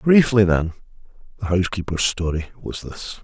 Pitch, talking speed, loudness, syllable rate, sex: 100 Hz, 130 wpm, -21 LUFS, 5.2 syllables/s, male